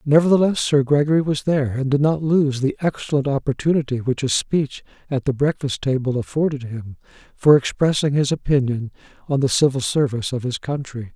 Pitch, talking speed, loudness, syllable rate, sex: 140 Hz, 170 wpm, -20 LUFS, 5.6 syllables/s, male